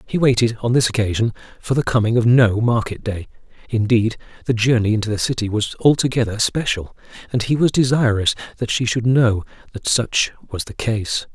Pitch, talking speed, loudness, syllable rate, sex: 115 Hz, 180 wpm, -19 LUFS, 5.3 syllables/s, male